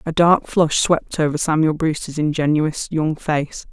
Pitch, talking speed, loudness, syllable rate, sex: 155 Hz, 160 wpm, -19 LUFS, 4.2 syllables/s, female